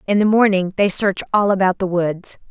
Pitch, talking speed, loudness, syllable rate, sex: 195 Hz, 215 wpm, -17 LUFS, 5.1 syllables/s, female